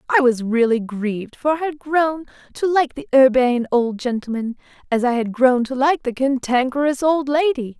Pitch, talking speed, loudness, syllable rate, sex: 265 Hz, 185 wpm, -19 LUFS, 5.1 syllables/s, female